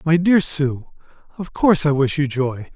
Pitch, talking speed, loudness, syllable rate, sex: 150 Hz, 175 wpm, -18 LUFS, 5.0 syllables/s, male